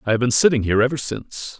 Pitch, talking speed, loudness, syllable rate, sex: 125 Hz, 265 wpm, -19 LUFS, 7.5 syllables/s, male